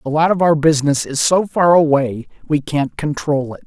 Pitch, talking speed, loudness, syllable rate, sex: 150 Hz, 215 wpm, -16 LUFS, 5.1 syllables/s, male